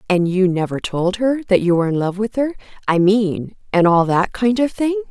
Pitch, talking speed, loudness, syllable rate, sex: 200 Hz, 225 wpm, -18 LUFS, 5.3 syllables/s, female